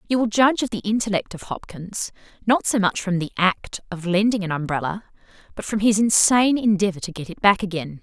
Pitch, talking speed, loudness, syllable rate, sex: 200 Hz, 210 wpm, -21 LUFS, 5.8 syllables/s, female